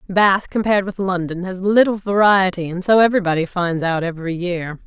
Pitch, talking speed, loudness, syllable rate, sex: 185 Hz, 175 wpm, -18 LUFS, 5.6 syllables/s, female